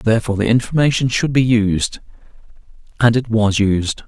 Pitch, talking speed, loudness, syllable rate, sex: 115 Hz, 135 wpm, -16 LUFS, 5.3 syllables/s, male